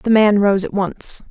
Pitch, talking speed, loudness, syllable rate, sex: 200 Hz, 230 wpm, -16 LUFS, 4.1 syllables/s, female